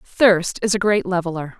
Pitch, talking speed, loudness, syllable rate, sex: 185 Hz, 190 wpm, -19 LUFS, 4.8 syllables/s, female